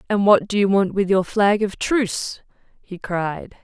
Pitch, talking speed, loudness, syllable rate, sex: 195 Hz, 200 wpm, -19 LUFS, 4.4 syllables/s, female